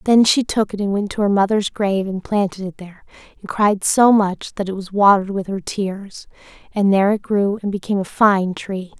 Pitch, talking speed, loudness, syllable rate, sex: 200 Hz, 225 wpm, -18 LUFS, 5.4 syllables/s, female